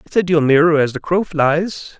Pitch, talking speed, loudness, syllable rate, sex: 160 Hz, 240 wpm, -16 LUFS, 4.8 syllables/s, male